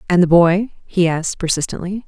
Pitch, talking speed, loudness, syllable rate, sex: 175 Hz, 175 wpm, -17 LUFS, 5.7 syllables/s, female